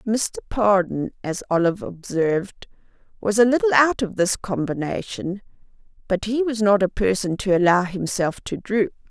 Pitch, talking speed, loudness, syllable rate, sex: 200 Hz, 150 wpm, -21 LUFS, 4.7 syllables/s, female